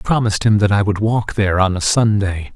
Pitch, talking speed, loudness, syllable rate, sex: 100 Hz, 260 wpm, -16 LUFS, 6.1 syllables/s, male